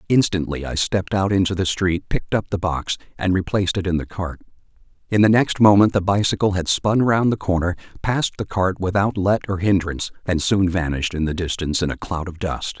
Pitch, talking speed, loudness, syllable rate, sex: 95 Hz, 215 wpm, -20 LUFS, 5.8 syllables/s, male